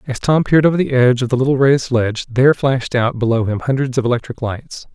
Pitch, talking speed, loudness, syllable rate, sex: 125 Hz, 245 wpm, -16 LUFS, 6.7 syllables/s, male